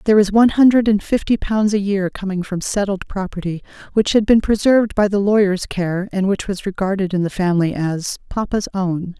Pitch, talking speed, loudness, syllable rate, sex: 195 Hz, 200 wpm, -18 LUFS, 5.6 syllables/s, female